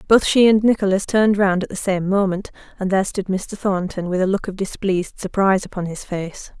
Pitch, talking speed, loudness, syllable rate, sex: 190 Hz, 220 wpm, -19 LUFS, 5.7 syllables/s, female